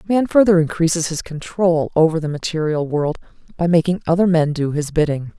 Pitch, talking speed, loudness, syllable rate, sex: 165 Hz, 180 wpm, -18 LUFS, 5.5 syllables/s, female